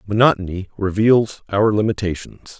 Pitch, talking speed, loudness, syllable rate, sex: 105 Hz, 95 wpm, -18 LUFS, 4.9 syllables/s, male